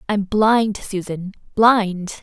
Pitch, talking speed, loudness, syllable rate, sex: 205 Hz, 80 wpm, -18 LUFS, 2.7 syllables/s, female